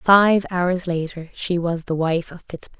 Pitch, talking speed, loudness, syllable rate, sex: 175 Hz, 195 wpm, -21 LUFS, 4.2 syllables/s, female